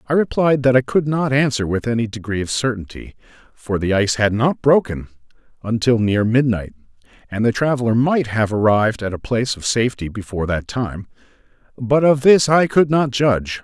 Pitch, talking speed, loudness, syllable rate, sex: 120 Hz, 185 wpm, -18 LUFS, 5.5 syllables/s, male